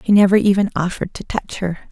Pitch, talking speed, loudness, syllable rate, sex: 190 Hz, 220 wpm, -18 LUFS, 6.6 syllables/s, female